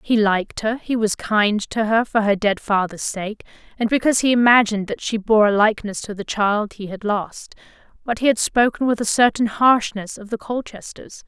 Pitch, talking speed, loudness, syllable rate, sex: 215 Hz, 210 wpm, -19 LUFS, 5.1 syllables/s, female